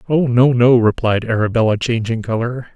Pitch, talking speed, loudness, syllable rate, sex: 120 Hz, 150 wpm, -16 LUFS, 5.2 syllables/s, male